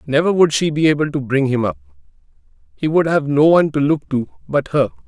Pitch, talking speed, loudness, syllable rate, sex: 150 Hz, 215 wpm, -17 LUFS, 6.1 syllables/s, male